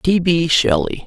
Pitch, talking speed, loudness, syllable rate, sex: 155 Hz, 170 wpm, -16 LUFS, 3.9 syllables/s, male